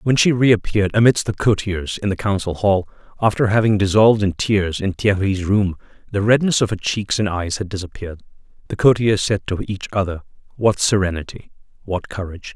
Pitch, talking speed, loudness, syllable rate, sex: 100 Hz, 175 wpm, -18 LUFS, 5.6 syllables/s, male